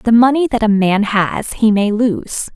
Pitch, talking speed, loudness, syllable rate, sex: 215 Hz, 210 wpm, -14 LUFS, 4.0 syllables/s, female